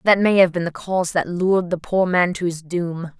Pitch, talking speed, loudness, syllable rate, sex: 175 Hz, 265 wpm, -20 LUFS, 5.3 syllables/s, female